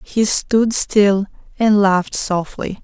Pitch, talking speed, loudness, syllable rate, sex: 205 Hz, 125 wpm, -16 LUFS, 3.3 syllables/s, female